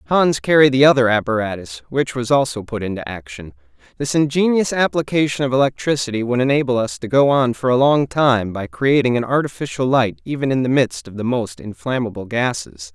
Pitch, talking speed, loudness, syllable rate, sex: 125 Hz, 185 wpm, -18 LUFS, 5.6 syllables/s, male